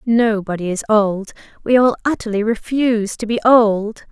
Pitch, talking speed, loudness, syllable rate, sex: 220 Hz, 130 wpm, -17 LUFS, 4.6 syllables/s, female